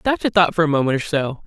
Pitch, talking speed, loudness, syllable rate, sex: 165 Hz, 330 wpm, -18 LUFS, 7.4 syllables/s, male